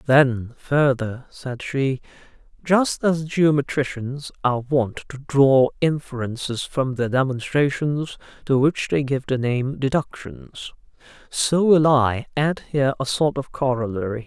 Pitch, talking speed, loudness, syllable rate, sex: 135 Hz, 130 wpm, -21 LUFS, 4.0 syllables/s, male